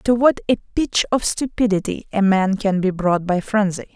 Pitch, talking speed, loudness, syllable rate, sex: 205 Hz, 195 wpm, -19 LUFS, 4.6 syllables/s, female